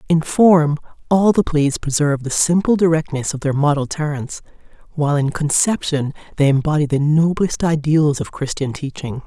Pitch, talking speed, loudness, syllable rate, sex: 150 Hz, 155 wpm, -17 LUFS, 5.1 syllables/s, female